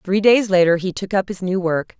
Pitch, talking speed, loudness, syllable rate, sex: 190 Hz, 270 wpm, -18 LUFS, 5.3 syllables/s, female